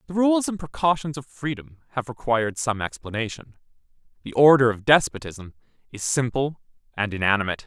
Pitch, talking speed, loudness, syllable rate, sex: 130 Hz, 140 wpm, -23 LUFS, 5.6 syllables/s, male